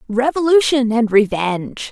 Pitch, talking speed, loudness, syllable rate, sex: 240 Hz, 95 wpm, -16 LUFS, 4.6 syllables/s, female